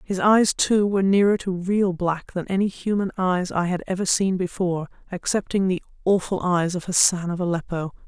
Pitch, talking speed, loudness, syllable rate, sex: 185 Hz, 180 wpm, -22 LUFS, 5.2 syllables/s, female